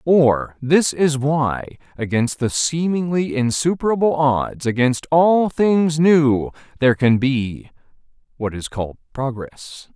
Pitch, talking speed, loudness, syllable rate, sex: 140 Hz, 120 wpm, -18 LUFS, 3.7 syllables/s, male